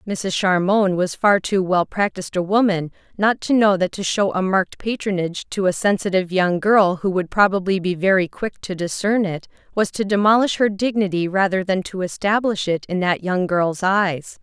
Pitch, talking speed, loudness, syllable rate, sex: 190 Hz, 195 wpm, -19 LUFS, 5.1 syllables/s, female